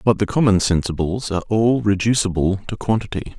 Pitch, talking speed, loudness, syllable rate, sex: 100 Hz, 160 wpm, -19 LUFS, 5.7 syllables/s, male